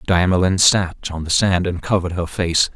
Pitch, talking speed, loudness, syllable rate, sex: 90 Hz, 195 wpm, -18 LUFS, 5.1 syllables/s, male